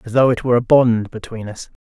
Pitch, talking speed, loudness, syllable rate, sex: 120 Hz, 260 wpm, -15 LUFS, 6.2 syllables/s, male